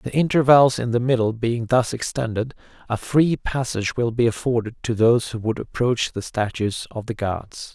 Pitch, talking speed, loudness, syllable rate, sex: 120 Hz, 185 wpm, -21 LUFS, 4.9 syllables/s, male